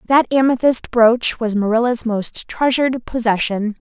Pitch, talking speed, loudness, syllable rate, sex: 235 Hz, 125 wpm, -17 LUFS, 4.3 syllables/s, female